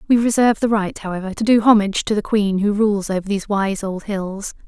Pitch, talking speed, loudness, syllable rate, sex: 205 Hz, 230 wpm, -18 LUFS, 6.0 syllables/s, female